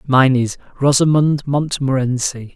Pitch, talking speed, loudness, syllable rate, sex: 135 Hz, 95 wpm, -16 LUFS, 4.1 syllables/s, male